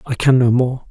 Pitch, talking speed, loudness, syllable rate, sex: 125 Hz, 265 wpm, -15 LUFS, 5.1 syllables/s, male